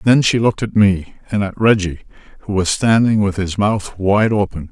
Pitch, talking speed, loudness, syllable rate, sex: 100 Hz, 205 wpm, -16 LUFS, 5.1 syllables/s, male